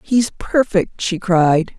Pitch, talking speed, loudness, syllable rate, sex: 190 Hz, 135 wpm, -17 LUFS, 3.1 syllables/s, female